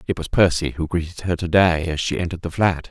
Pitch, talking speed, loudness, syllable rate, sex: 85 Hz, 270 wpm, -20 LUFS, 6.2 syllables/s, male